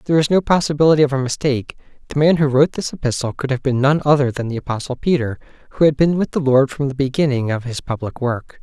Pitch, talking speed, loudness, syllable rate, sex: 140 Hz, 245 wpm, -18 LUFS, 6.8 syllables/s, male